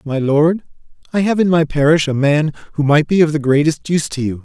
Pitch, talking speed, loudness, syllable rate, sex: 155 Hz, 245 wpm, -15 LUFS, 5.8 syllables/s, male